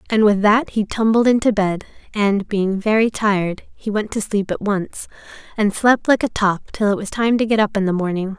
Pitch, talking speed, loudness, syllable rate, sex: 205 Hz, 230 wpm, -18 LUFS, 5.1 syllables/s, female